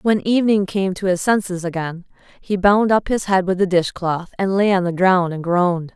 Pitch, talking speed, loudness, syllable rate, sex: 185 Hz, 220 wpm, -18 LUFS, 5.0 syllables/s, female